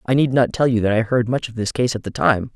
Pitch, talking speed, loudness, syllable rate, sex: 115 Hz, 355 wpm, -19 LUFS, 6.2 syllables/s, female